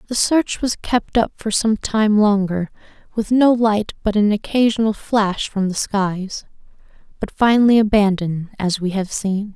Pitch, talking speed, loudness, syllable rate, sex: 210 Hz, 165 wpm, -18 LUFS, 4.4 syllables/s, female